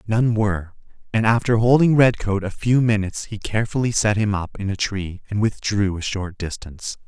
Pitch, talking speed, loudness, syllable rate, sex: 105 Hz, 185 wpm, -21 LUFS, 5.3 syllables/s, male